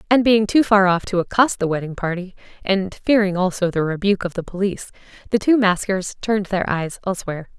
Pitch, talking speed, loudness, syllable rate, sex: 195 Hz, 200 wpm, -19 LUFS, 6.0 syllables/s, female